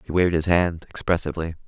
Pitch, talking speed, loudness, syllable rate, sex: 85 Hz, 180 wpm, -23 LUFS, 7.1 syllables/s, male